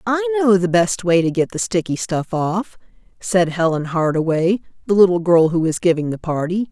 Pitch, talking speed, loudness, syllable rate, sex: 180 Hz, 195 wpm, -18 LUFS, 4.8 syllables/s, female